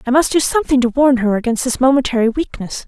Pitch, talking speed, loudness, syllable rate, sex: 255 Hz, 230 wpm, -15 LUFS, 6.6 syllables/s, female